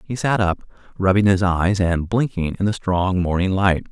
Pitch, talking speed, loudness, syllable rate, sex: 95 Hz, 200 wpm, -19 LUFS, 4.7 syllables/s, male